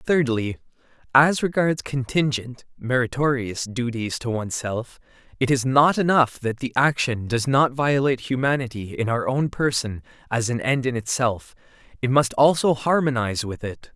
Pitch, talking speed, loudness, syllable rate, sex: 130 Hz, 145 wpm, -22 LUFS, 4.7 syllables/s, male